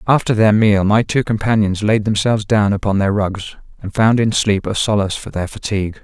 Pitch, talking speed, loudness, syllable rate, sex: 105 Hz, 210 wpm, -16 LUFS, 5.5 syllables/s, male